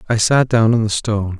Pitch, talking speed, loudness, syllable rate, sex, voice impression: 110 Hz, 260 wpm, -16 LUFS, 5.8 syllables/s, male, masculine, adult-like, slightly thick, tensed, slightly powerful, hard, clear, cool, intellectual, slightly mature, wild, lively, slightly strict, slightly modest